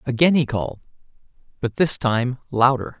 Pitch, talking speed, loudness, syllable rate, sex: 125 Hz, 140 wpm, -20 LUFS, 5.1 syllables/s, male